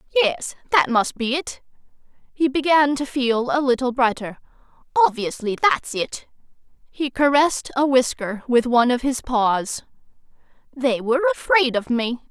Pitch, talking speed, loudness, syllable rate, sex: 260 Hz, 140 wpm, -20 LUFS, 4.8 syllables/s, female